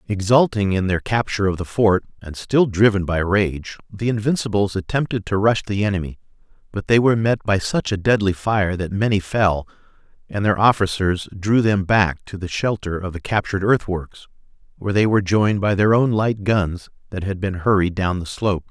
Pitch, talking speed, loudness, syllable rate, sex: 100 Hz, 190 wpm, -19 LUFS, 5.3 syllables/s, male